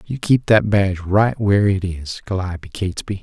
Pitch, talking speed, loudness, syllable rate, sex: 100 Hz, 185 wpm, -19 LUFS, 5.2 syllables/s, male